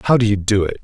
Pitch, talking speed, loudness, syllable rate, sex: 105 Hz, 360 wpm, -17 LUFS, 7.8 syllables/s, male